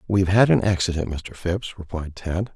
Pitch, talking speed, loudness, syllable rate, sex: 90 Hz, 190 wpm, -22 LUFS, 5.0 syllables/s, male